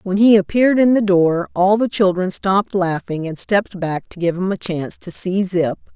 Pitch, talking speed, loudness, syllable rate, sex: 190 Hz, 220 wpm, -17 LUFS, 5.2 syllables/s, female